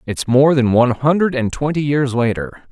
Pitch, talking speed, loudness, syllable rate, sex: 135 Hz, 200 wpm, -16 LUFS, 5.0 syllables/s, male